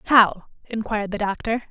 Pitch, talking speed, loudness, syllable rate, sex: 215 Hz, 140 wpm, -22 LUFS, 5.9 syllables/s, female